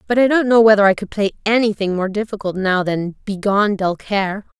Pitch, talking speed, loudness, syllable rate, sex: 205 Hz, 210 wpm, -17 LUFS, 5.6 syllables/s, female